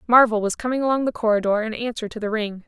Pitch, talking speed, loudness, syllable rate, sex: 225 Hz, 245 wpm, -21 LUFS, 6.8 syllables/s, female